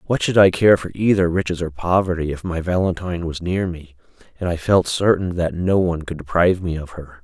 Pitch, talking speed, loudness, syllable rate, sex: 90 Hz, 225 wpm, -19 LUFS, 5.8 syllables/s, male